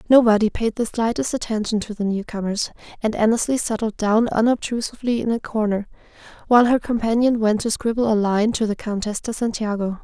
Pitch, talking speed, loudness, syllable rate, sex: 220 Hz, 175 wpm, -21 LUFS, 5.8 syllables/s, female